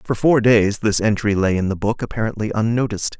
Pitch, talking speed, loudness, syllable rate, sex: 110 Hz, 205 wpm, -18 LUFS, 5.8 syllables/s, male